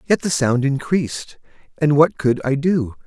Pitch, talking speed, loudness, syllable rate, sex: 145 Hz, 155 wpm, -18 LUFS, 4.4 syllables/s, male